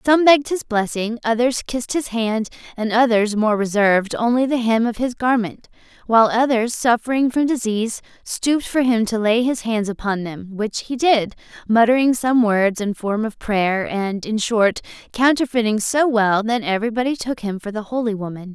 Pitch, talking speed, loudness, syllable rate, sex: 225 Hz, 180 wpm, -19 LUFS, 5.0 syllables/s, female